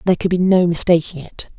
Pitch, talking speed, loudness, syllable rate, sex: 175 Hz, 225 wpm, -16 LUFS, 6.3 syllables/s, female